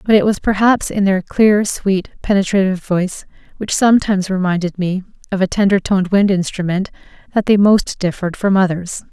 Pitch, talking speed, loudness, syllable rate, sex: 195 Hz, 170 wpm, -16 LUFS, 5.6 syllables/s, female